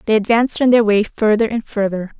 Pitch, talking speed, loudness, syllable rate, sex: 220 Hz, 220 wpm, -16 LUFS, 6.1 syllables/s, female